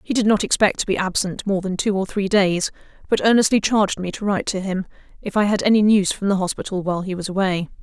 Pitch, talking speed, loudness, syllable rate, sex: 195 Hz, 255 wpm, -20 LUFS, 6.4 syllables/s, female